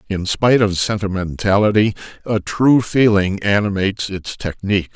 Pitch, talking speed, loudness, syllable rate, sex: 100 Hz, 120 wpm, -17 LUFS, 4.9 syllables/s, male